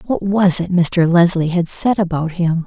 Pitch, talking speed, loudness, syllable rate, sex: 175 Hz, 200 wpm, -16 LUFS, 4.4 syllables/s, female